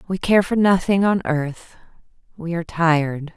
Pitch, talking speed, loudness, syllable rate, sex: 175 Hz, 160 wpm, -19 LUFS, 4.7 syllables/s, female